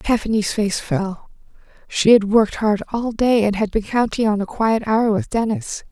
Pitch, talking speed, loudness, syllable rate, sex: 215 Hz, 195 wpm, -19 LUFS, 4.6 syllables/s, female